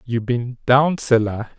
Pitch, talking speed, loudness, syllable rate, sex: 125 Hz, 150 wpm, -19 LUFS, 3.7 syllables/s, male